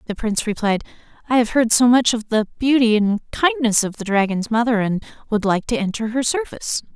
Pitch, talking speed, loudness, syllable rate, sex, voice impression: 230 Hz, 205 wpm, -19 LUFS, 5.6 syllables/s, female, feminine, adult-like, tensed, powerful, bright, clear, friendly, unique, very lively, intense, sharp